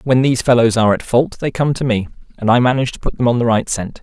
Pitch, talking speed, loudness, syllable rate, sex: 120 Hz, 300 wpm, -16 LUFS, 6.9 syllables/s, male